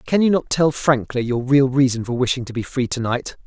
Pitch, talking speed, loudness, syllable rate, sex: 130 Hz, 260 wpm, -19 LUFS, 5.5 syllables/s, male